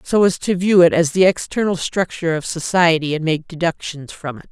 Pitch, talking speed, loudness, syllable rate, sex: 170 Hz, 215 wpm, -17 LUFS, 5.5 syllables/s, female